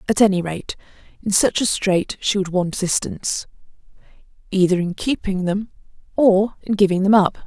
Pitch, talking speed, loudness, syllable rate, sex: 195 Hz, 160 wpm, -19 LUFS, 5.1 syllables/s, female